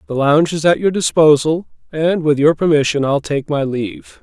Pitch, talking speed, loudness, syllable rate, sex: 150 Hz, 200 wpm, -15 LUFS, 5.3 syllables/s, male